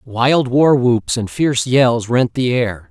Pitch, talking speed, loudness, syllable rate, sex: 125 Hz, 185 wpm, -15 LUFS, 3.6 syllables/s, male